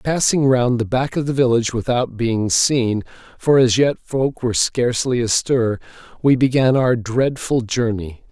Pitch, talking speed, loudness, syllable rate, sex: 120 Hz, 160 wpm, -18 LUFS, 4.5 syllables/s, male